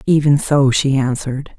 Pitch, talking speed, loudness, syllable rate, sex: 140 Hz, 150 wpm, -15 LUFS, 4.8 syllables/s, female